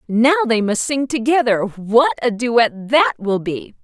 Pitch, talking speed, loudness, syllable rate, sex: 240 Hz, 170 wpm, -17 LUFS, 3.8 syllables/s, female